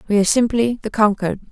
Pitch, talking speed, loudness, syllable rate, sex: 215 Hz, 200 wpm, -18 LUFS, 7.4 syllables/s, female